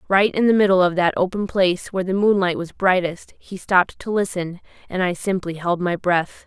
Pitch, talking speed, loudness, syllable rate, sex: 185 Hz, 215 wpm, -20 LUFS, 5.4 syllables/s, female